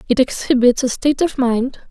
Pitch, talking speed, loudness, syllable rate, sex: 255 Hz, 190 wpm, -17 LUFS, 5.6 syllables/s, female